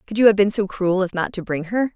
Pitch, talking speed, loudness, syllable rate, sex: 200 Hz, 340 wpm, -20 LUFS, 6.1 syllables/s, female